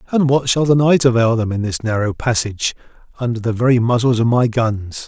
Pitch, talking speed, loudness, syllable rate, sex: 120 Hz, 215 wpm, -16 LUFS, 5.7 syllables/s, male